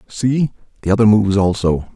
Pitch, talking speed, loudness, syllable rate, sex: 105 Hz, 155 wpm, -16 LUFS, 5.7 syllables/s, male